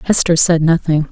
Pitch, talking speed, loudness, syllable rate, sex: 165 Hz, 160 wpm, -13 LUFS, 5.1 syllables/s, female